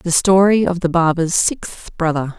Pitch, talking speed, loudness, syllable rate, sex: 175 Hz, 175 wpm, -16 LUFS, 4.4 syllables/s, female